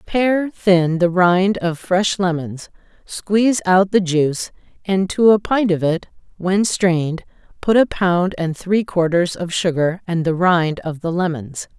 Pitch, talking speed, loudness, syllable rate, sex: 180 Hz, 170 wpm, -18 LUFS, 3.9 syllables/s, female